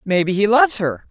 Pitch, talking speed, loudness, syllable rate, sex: 215 Hz, 220 wpm, -16 LUFS, 6.0 syllables/s, female